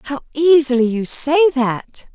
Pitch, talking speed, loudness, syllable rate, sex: 255 Hz, 140 wpm, -15 LUFS, 4.5 syllables/s, female